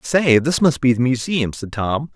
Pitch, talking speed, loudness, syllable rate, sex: 130 Hz, 225 wpm, -18 LUFS, 4.4 syllables/s, male